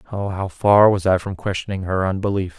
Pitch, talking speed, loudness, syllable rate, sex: 95 Hz, 185 wpm, -19 LUFS, 4.7 syllables/s, male